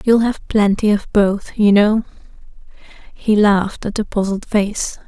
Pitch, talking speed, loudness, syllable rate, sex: 210 Hz, 155 wpm, -16 LUFS, 4.2 syllables/s, female